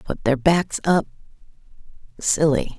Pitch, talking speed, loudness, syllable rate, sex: 150 Hz, 85 wpm, -20 LUFS, 3.8 syllables/s, female